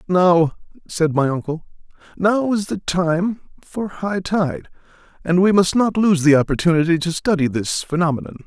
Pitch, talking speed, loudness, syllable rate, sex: 175 Hz, 155 wpm, -18 LUFS, 4.7 syllables/s, male